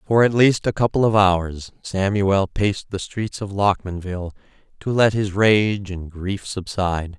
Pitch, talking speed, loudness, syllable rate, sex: 100 Hz, 165 wpm, -20 LUFS, 4.3 syllables/s, male